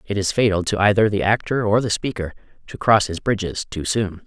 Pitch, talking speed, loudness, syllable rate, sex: 105 Hz, 225 wpm, -20 LUFS, 5.6 syllables/s, male